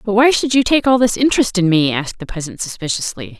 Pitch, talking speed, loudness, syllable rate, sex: 205 Hz, 250 wpm, -16 LUFS, 6.4 syllables/s, female